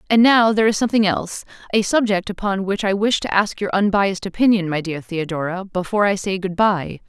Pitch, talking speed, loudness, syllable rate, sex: 195 Hz, 210 wpm, -19 LUFS, 6.1 syllables/s, female